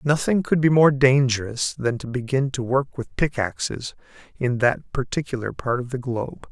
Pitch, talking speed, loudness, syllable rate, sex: 130 Hz, 175 wpm, -22 LUFS, 4.9 syllables/s, male